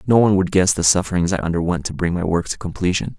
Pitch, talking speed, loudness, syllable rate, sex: 90 Hz, 265 wpm, -19 LUFS, 6.9 syllables/s, male